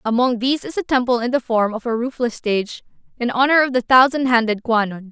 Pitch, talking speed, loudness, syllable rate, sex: 245 Hz, 225 wpm, -18 LUFS, 6.0 syllables/s, female